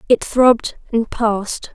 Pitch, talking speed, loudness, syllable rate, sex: 230 Hz, 105 wpm, -17 LUFS, 4.3 syllables/s, female